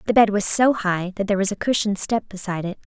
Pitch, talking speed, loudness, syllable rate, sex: 200 Hz, 265 wpm, -20 LUFS, 6.9 syllables/s, female